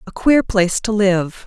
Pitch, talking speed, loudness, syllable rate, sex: 205 Hz, 205 wpm, -16 LUFS, 4.5 syllables/s, female